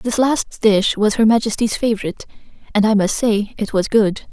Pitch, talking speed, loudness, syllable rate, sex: 215 Hz, 195 wpm, -17 LUFS, 5.1 syllables/s, female